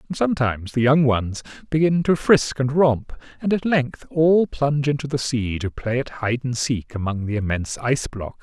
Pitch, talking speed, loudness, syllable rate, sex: 130 Hz, 200 wpm, -21 LUFS, 5.0 syllables/s, male